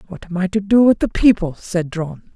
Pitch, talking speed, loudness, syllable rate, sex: 185 Hz, 255 wpm, -17 LUFS, 5.4 syllables/s, female